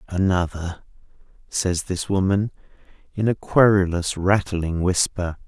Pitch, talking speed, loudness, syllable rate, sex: 95 Hz, 100 wpm, -22 LUFS, 4.0 syllables/s, male